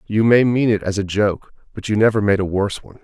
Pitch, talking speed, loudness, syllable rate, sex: 105 Hz, 275 wpm, -18 LUFS, 6.4 syllables/s, male